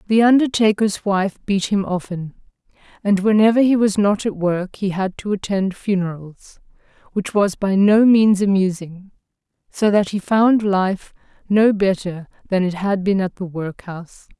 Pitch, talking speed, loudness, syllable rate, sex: 195 Hz, 160 wpm, -18 LUFS, 4.5 syllables/s, female